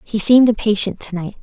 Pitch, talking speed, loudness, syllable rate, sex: 210 Hz, 210 wpm, -15 LUFS, 6.2 syllables/s, female